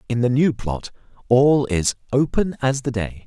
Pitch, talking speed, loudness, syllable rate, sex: 125 Hz, 185 wpm, -20 LUFS, 4.4 syllables/s, male